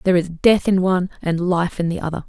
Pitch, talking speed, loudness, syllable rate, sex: 180 Hz, 265 wpm, -19 LUFS, 6.4 syllables/s, female